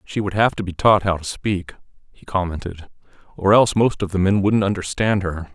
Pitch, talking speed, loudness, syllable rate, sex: 95 Hz, 215 wpm, -19 LUFS, 5.4 syllables/s, male